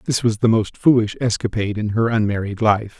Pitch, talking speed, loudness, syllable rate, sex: 110 Hz, 200 wpm, -19 LUFS, 5.7 syllables/s, male